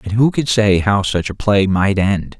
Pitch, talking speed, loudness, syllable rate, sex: 105 Hz, 250 wpm, -15 LUFS, 4.4 syllables/s, male